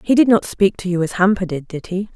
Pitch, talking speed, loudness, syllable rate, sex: 190 Hz, 305 wpm, -18 LUFS, 5.9 syllables/s, female